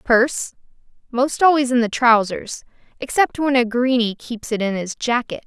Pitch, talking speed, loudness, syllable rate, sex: 245 Hz, 155 wpm, -19 LUFS, 4.8 syllables/s, female